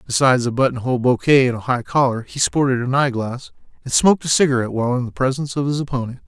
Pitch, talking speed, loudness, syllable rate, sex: 130 Hz, 220 wpm, -18 LUFS, 6.9 syllables/s, male